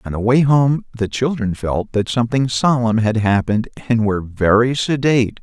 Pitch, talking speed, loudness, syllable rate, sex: 115 Hz, 175 wpm, -17 LUFS, 5.2 syllables/s, male